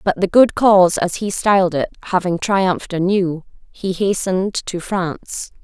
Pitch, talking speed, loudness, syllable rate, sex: 185 Hz, 160 wpm, -17 LUFS, 4.7 syllables/s, female